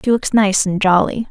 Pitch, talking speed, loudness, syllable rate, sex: 205 Hz, 230 wpm, -15 LUFS, 5.0 syllables/s, female